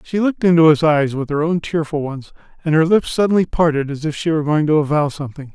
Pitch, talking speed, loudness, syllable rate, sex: 155 Hz, 250 wpm, -17 LUFS, 6.4 syllables/s, male